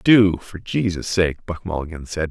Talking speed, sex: 180 wpm, male